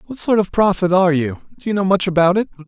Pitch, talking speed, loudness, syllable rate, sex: 185 Hz, 270 wpm, -17 LUFS, 6.8 syllables/s, male